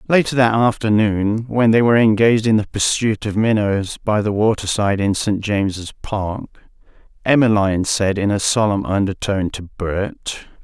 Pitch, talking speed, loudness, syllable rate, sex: 105 Hz, 150 wpm, -17 LUFS, 4.9 syllables/s, male